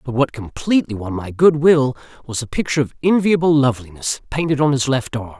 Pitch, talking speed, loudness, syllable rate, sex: 135 Hz, 200 wpm, -18 LUFS, 6.0 syllables/s, male